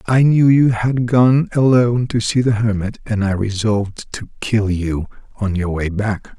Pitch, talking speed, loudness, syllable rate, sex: 110 Hz, 190 wpm, -17 LUFS, 4.5 syllables/s, male